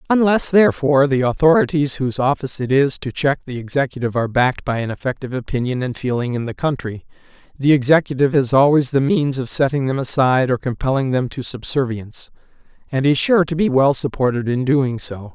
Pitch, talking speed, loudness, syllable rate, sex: 135 Hz, 190 wpm, -18 LUFS, 6.1 syllables/s, male